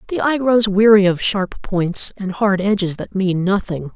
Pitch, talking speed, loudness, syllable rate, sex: 200 Hz, 195 wpm, -17 LUFS, 4.4 syllables/s, female